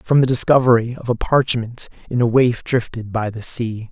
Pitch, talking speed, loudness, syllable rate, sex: 120 Hz, 200 wpm, -18 LUFS, 4.9 syllables/s, male